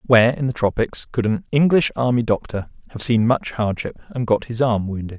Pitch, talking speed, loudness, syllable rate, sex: 115 Hz, 210 wpm, -20 LUFS, 5.3 syllables/s, male